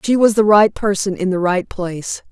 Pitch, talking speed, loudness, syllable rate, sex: 195 Hz, 235 wpm, -16 LUFS, 5.1 syllables/s, female